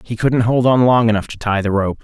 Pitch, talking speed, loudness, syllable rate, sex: 115 Hz, 295 wpm, -15 LUFS, 5.7 syllables/s, male